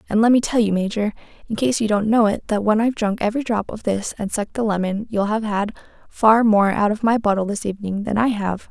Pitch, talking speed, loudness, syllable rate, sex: 215 Hz, 255 wpm, -20 LUFS, 6.1 syllables/s, female